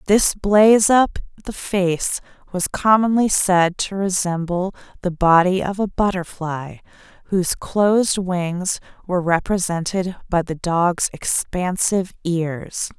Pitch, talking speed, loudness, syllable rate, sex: 185 Hz, 115 wpm, -19 LUFS, 3.9 syllables/s, female